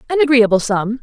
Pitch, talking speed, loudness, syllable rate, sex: 240 Hz, 175 wpm, -14 LUFS, 5.9 syllables/s, female